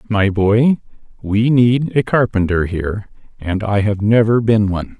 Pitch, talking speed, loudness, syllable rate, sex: 110 Hz, 155 wpm, -16 LUFS, 4.4 syllables/s, male